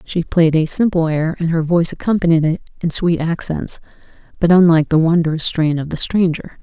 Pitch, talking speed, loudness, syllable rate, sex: 165 Hz, 190 wpm, -16 LUFS, 5.4 syllables/s, female